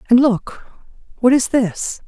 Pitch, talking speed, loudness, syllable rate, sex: 245 Hz, 145 wpm, -17 LUFS, 4.2 syllables/s, female